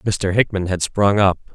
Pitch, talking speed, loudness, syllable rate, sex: 95 Hz, 195 wpm, -18 LUFS, 4.4 syllables/s, male